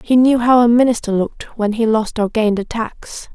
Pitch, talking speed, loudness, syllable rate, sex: 225 Hz, 235 wpm, -16 LUFS, 5.3 syllables/s, female